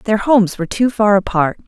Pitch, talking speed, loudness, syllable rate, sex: 205 Hz, 215 wpm, -15 LUFS, 5.8 syllables/s, female